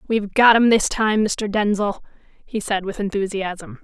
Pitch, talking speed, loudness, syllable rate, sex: 205 Hz, 170 wpm, -19 LUFS, 4.4 syllables/s, female